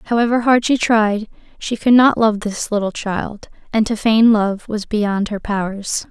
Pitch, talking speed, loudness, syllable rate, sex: 215 Hz, 185 wpm, -17 LUFS, 4.3 syllables/s, female